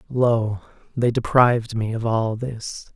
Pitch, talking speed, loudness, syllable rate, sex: 115 Hz, 140 wpm, -21 LUFS, 3.8 syllables/s, male